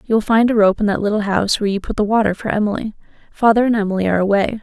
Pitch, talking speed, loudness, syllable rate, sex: 210 Hz, 275 wpm, -17 LUFS, 7.7 syllables/s, female